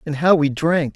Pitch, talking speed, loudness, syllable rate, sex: 155 Hz, 250 wpm, -18 LUFS, 4.6 syllables/s, male